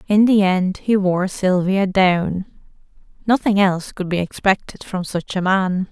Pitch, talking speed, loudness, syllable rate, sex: 190 Hz, 160 wpm, -18 LUFS, 4.2 syllables/s, female